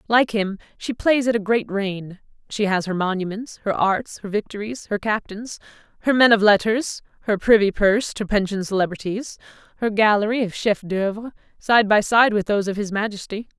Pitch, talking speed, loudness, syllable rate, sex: 210 Hz, 180 wpm, -21 LUFS, 5.2 syllables/s, female